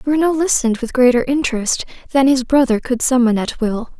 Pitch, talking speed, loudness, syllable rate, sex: 255 Hz, 180 wpm, -16 LUFS, 5.5 syllables/s, female